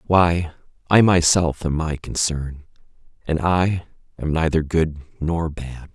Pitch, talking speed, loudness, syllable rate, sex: 80 Hz, 130 wpm, -20 LUFS, 3.6 syllables/s, male